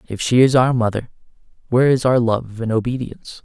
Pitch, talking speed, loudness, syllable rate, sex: 120 Hz, 190 wpm, -17 LUFS, 6.0 syllables/s, male